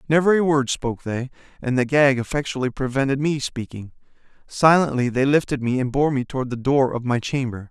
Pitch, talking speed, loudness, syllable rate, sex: 135 Hz, 195 wpm, -21 LUFS, 5.7 syllables/s, male